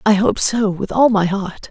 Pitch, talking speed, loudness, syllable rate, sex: 205 Hz, 245 wpm, -16 LUFS, 4.4 syllables/s, female